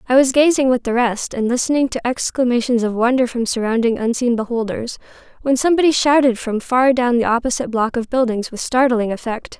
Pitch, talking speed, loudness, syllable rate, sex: 245 Hz, 190 wpm, -17 LUFS, 5.8 syllables/s, female